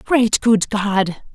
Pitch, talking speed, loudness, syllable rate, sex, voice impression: 215 Hz, 135 wpm, -17 LUFS, 2.5 syllables/s, female, feminine, adult-like, tensed, powerful, raspy, slightly friendly, slightly unique, slightly wild, lively, strict, intense, sharp